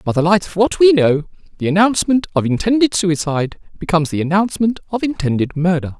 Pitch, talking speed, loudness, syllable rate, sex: 185 Hz, 180 wpm, -16 LUFS, 6.3 syllables/s, male